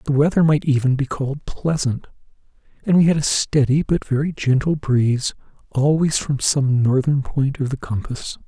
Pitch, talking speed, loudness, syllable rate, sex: 140 Hz, 170 wpm, -19 LUFS, 4.9 syllables/s, male